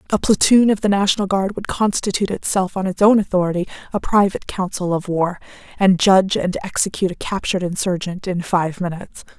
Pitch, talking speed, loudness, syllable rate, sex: 190 Hz, 180 wpm, -18 LUFS, 6.1 syllables/s, female